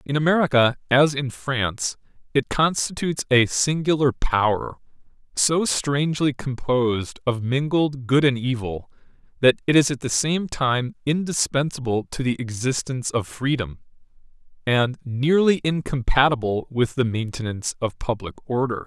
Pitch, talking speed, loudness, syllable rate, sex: 135 Hz, 125 wpm, -22 LUFS, 4.7 syllables/s, male